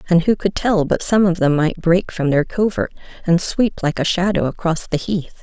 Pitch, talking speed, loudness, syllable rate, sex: 175 Hz, 230 wpm, -18 LUFS, 5.0 syllables/s, female